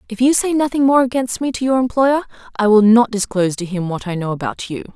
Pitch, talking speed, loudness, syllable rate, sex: 230 Hz, 255 wpm, -17 LUFS, 6.1 syllables/s, female